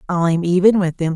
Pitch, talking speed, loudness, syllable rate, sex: 175 Hz, 205 wpm, -16 LUFS, 5.2 syllables/s, female